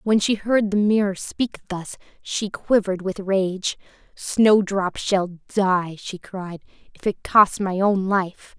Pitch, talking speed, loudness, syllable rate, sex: 195 Hz, 155 wpm, -21 LUFS, 3.5 syllables/s, female